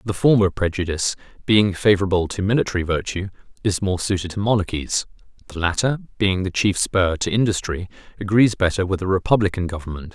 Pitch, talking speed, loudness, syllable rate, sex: 95 Hz, 160 wpm, -20 LUFS, 6.0 syllables/s, male